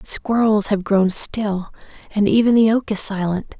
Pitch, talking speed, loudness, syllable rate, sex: 205 Hz, 185 wpm, -18 LUFS, 4.4 syllables/s, female